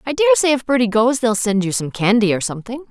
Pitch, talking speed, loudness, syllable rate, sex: 225 Hz, 270 wpm, -17 LUFS, 6.5 syllables/s, female